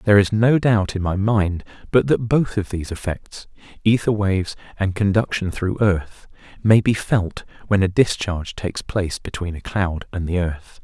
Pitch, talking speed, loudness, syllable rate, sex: 100 Hz, 185 wpm, -20 LUFS, 4.7 syllables/s, male